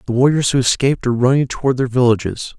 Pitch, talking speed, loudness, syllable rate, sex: 130 Hz, 210 wpm, -16 LUFS, 7.0 syllables/s, male